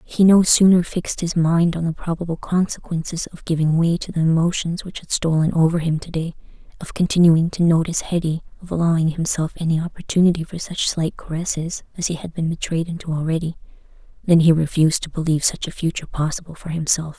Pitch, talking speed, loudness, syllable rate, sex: 165 Hz, 185 wpm, -20 LUFS, 6.2 syllables/s, female